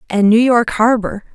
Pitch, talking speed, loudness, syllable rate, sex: 225 Hz, 180 wpm, -13 LUFS, 4.6 syllables/s, female